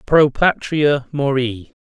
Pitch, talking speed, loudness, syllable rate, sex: 140 Hz, 100 wpm, -17 LUFS, 3.2 syllables/s, male